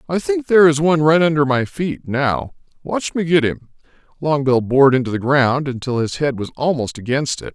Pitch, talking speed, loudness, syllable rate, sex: 145 Hz, 205 wpm, -17 LUFS, 5.4 syllables/s, male